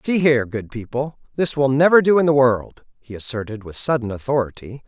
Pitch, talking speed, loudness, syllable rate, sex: 130 Hz, 195 wpm, -19 LUFS, 5.6 syllables/s, male